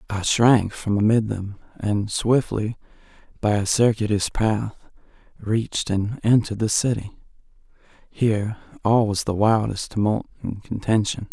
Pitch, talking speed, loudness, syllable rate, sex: 105 Hz, 125 wpm, -22 LUFS, 4.4 syllables/s, male